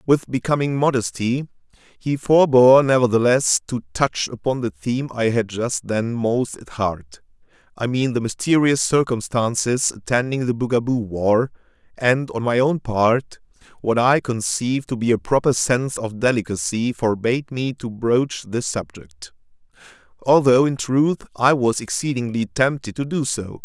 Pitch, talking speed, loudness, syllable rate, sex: 120 Hz, 140 wpm, -20 LUFS, 4.6 syllables/s, male